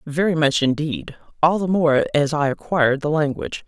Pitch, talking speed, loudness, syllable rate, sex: 150 Hz, 180 wpm, -20 LUFS, 5.4 syllables/s, female